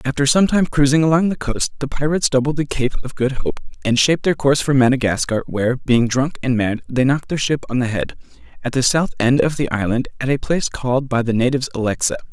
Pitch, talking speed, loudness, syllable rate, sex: 135 Hz, 235 wpm, -18 LUFS, 6.3 syllables/s, male